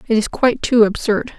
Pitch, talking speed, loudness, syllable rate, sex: 230 Hz, 215 wpm, -16 LUFS, 5.8 syllables/s, female